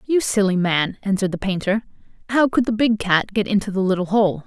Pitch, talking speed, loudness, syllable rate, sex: 205 Hz, 215 wpm, -20 LUFS, 5.7 syllables/s, female